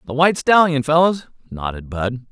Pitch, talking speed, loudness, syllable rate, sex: 140 Hz, 155 wpm, -17 LUFS, 5.1 syllables/s, male